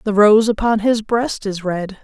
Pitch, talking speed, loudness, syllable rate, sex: 210 Hz, 205 wpm, -16 LUFS, 4.2 syllables/s, female